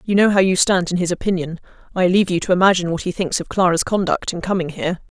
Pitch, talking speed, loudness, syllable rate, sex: 180 Hz, 245 wpm, -18 LUFS, 7.0 syllables/s, female